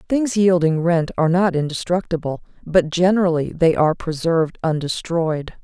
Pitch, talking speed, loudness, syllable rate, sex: 170 Hz, 130 wpm, -19 LUFS, 5.2 syllables/s, female